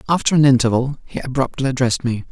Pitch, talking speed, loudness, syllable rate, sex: 135 Hz, 180 wpm, -18 LUFS, 7.0 syllables/s, male